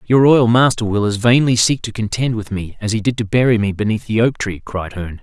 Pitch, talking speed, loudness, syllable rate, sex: 110 Hz, 265 wpm, -16 LUFS, 5.7 syllables/s, male